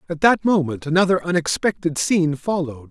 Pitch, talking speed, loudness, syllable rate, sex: 165 Hz, 145 wpm, -20 LUFS, 5.9 syllables/s, male